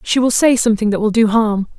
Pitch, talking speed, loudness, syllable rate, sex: 220 Hz, 270 wpm, -14 LUFS, 6.2 syllables/s, female